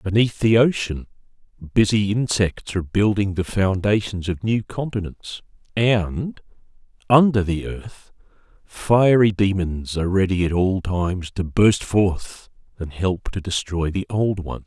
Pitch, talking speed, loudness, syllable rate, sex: 100 Hz, 135 wpm, -20 LUFS, 4.1 syllables/s, male